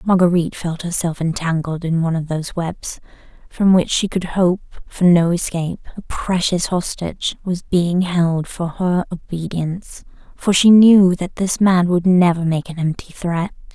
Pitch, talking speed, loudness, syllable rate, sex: 175 Hz, 165 wpm, -18 LUFS, 4.6 syllables/s, female